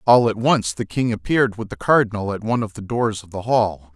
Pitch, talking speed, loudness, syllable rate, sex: 110 Hz, 260 wpm, -20 LUFS, 5.8 syllables/s, male